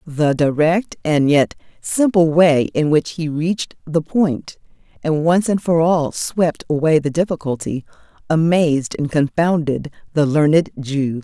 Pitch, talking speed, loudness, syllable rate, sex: 155 Hz, 145 wpm, -17 LUFS, 4.1 syllables/s, female